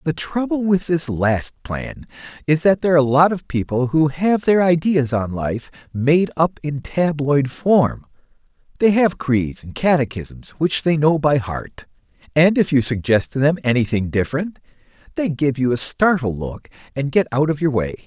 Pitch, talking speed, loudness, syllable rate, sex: 150 Hz, 185 wpm, -19 LUFS, 4.6 syllables/s, male